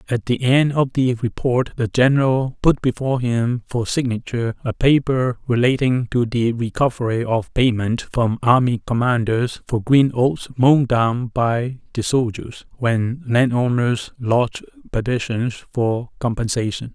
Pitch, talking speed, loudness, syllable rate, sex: 120 Hz, 135 wpm, -19 LUFS, 4.2 syllables/s, male